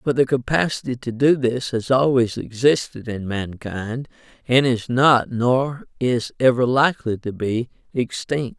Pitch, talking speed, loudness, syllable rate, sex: 125 Hz, 145 wpm, -20 LUFS, 4.2 syllables/s, male